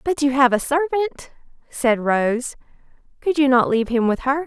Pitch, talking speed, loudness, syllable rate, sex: 270 Hz, 190 wpm, -19 LUFS, 4.8 syllables/s, female